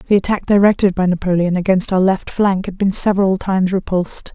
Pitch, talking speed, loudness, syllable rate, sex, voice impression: 190 Hz, 195 wpm, -16 LUFS, 6.0 syllables/s, female, feminine, adult-like, relaxed, weak, slightly soft, raspy, intellectual, calm, reassuring, elegant, slightly kind, modest